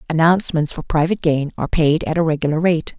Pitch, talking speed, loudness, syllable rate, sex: 160 Hz, 200 wpm, -18 LUFS, 6.5 syllables/s, female